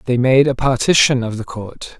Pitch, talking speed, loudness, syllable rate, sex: 125 Hz, 210 wpm, -15 LUFS, 4.9 syllables/s, male